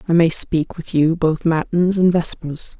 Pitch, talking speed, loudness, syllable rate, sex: 165 Hz, 195 wpm, -18 LUFS, 4.2 syllables/s, female